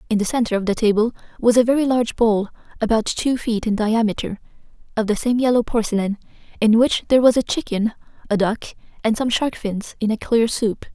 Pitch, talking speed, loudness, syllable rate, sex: 225 Hz, 205 wpm, -20 LUFS, 5.9 syllables/s, female